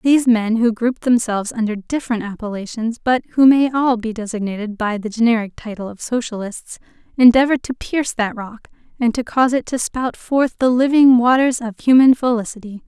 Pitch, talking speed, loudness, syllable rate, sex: 235 Hz, 175 wpm, -17 LUFS, 5.7 syllables/s, female